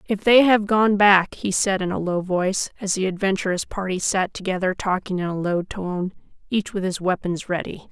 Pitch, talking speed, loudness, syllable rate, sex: 190 Hz, 205 wpm, -21 LUFS, 5.1 syllables/s, female